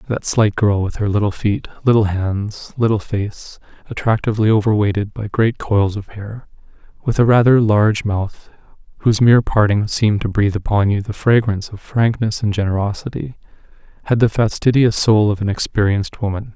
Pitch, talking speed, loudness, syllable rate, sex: 105 Hz, 165 wpm, -17 LUFS, 5.4 syllables/s, male